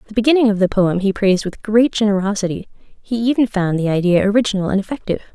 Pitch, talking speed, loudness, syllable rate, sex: 205 Hz, 200 wpm, -17 LUFS, 6.7 syllables/s, female